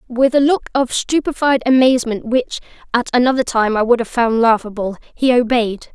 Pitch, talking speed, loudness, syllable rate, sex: 245 Hz, 170 wpm, -16 LUFS, 5.3 syllables/s, female